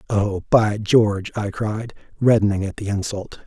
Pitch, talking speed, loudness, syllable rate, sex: 105 Hz, 155 wpm, -20 LUFS, 4.5 syllables/s, male